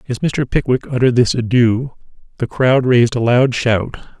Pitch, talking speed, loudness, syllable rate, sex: 125 Hz, 170 wpm, -15 LUFS, 5.0 syllables/s, male